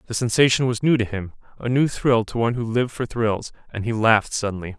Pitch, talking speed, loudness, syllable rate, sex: 115 Hz, 225 wpm, -21 LUFS, 6.2 syllables/s, male